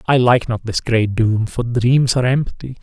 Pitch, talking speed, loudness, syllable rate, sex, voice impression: 120 Hz, 210 wpm, -17 LUFS, 4.5 syllables/s, male, very masculine, adult-like, slightly thick, slightly dark, slightly calm, slightly reassuring, slightly kind